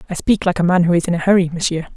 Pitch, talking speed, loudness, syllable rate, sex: 175 Hz, 335 wpm, -16 LUFS, 7.9 syllables/s, female